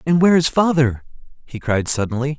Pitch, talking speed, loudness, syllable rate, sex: 140 Hz, 175 wpm, -17 LUFS, 6.0 syllables/s, male